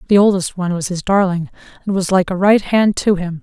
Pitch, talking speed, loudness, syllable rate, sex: 190 Hz, 245 wpm, -16 LUFS, 5.9 syllables/s, female